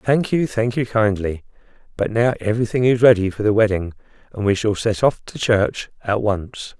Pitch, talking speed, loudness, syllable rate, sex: 110 Hz, 195 wpm, -19 LUFS, 4.9 syllables/s, male